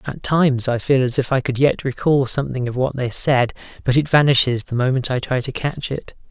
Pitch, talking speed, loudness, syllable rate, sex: 130 Hz, 240 wpm, -19 LUFS, 5.6 syllables/s, male